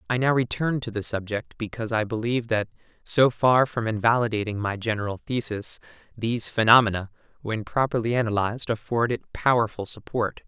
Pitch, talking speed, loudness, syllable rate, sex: 115 Hz, 150 wpm, -24 LUFS, 5.6 syllables/s, male